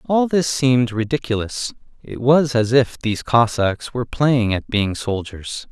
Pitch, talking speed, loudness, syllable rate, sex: 120 Hz, 155 wpm, -19 LUFS, 4.3 syllables/s, male